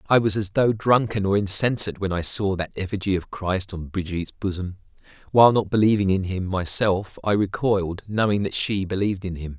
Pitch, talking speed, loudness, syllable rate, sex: 100 Hz, 195 wpm, -23 LUFS, 5.6 syllables/s, male